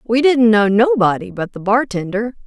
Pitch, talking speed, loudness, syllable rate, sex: 230 Hz, 170 wpm, -15 LUFS, 4.8 syllables/s, female